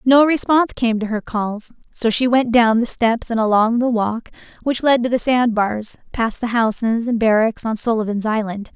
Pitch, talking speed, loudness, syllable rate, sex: 230 Hz, 205 wpm, -18 LUFS, 4.8 syllables/s, female